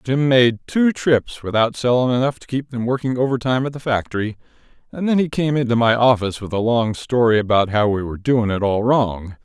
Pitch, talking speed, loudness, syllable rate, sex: 120 Hz, 215 wpm, -18 LUFS, 5.6 syllables/s, male